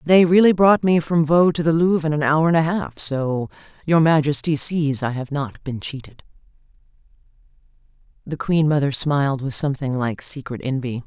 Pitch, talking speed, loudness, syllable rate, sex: 150 Hz, 180 wpm, -19 LUFS, 5.1 syllables/s, female